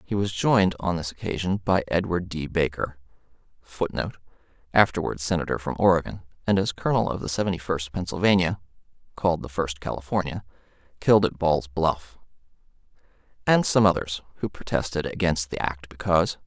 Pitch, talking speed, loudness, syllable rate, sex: 85 Hz, 145 wpm, -25 LUFS, 4.5 syllables/s, male